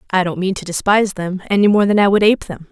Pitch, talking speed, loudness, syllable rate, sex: 195 Hz, 285 wpm, -16 LUFS, 7.0 syllables/s, female